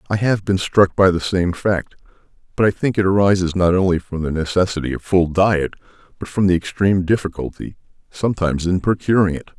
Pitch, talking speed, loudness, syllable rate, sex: 95 Hz, 190 wpm, -18 LUFS, 5.8 syllables/s, male